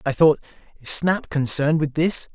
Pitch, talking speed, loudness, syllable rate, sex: 150 Hz, 180 wpm, -20 LUFS, 5.1 syllables/s, male